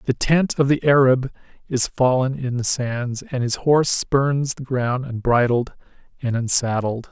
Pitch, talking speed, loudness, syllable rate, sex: 130 Hz, 160 wpm, -20 LUFS, 4.3 syllables/s, male